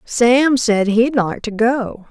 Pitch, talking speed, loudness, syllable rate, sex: 235 Hz, 170 wpm, -16 LUFS, 3.0 syllables/s, female